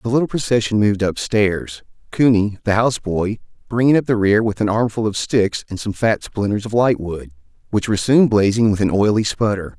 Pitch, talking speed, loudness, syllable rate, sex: 105 Hz, 195 wpm, -18 LUFS, 5.3 syllables/s, male